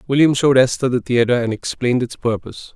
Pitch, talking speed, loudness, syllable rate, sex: 125 Hz, 195 wpm, -17 LUFS, 6.6 syllables/s, male